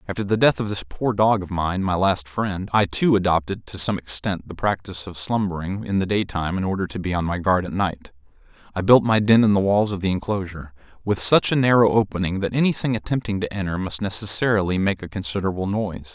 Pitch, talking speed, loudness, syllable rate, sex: 95 Hz, 225 wpm, -21 LUFS, 6.1 syllables/s, male